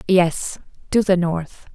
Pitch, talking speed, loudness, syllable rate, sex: 180 Hz, 135 wpm, -20 LUFS, 3.2 syllables/s, female